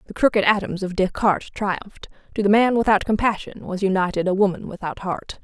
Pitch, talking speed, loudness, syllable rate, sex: 200 Hz, 190 wpm, -21 LUFS, 5.8 syllables/s, female